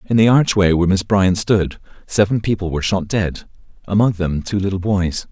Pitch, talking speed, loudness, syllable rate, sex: 95 Hz, 190 wpm, -17 LUFS, 5.3 syllables/s, male